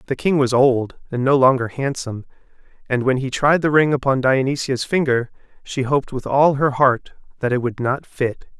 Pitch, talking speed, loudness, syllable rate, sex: 130 Hz, 195 wpm, -19 LUFS, 5.1 syllables/s, male